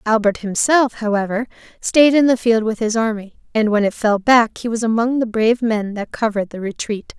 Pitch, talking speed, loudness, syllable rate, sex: 225 Hz, 210 wpm, -17 LUFS, 5.3 syllables/s, female